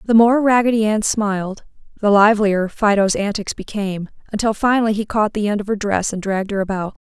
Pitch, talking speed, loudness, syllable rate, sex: 210 Hz, 195 wpm, -18 LUFS, 5.9 syllables/s, female